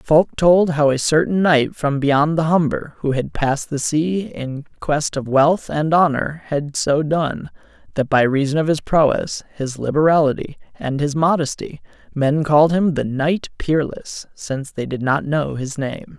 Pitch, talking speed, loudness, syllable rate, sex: 150 Hz, 180 wpm, -18 LUFS, 4.3 syllables/s, male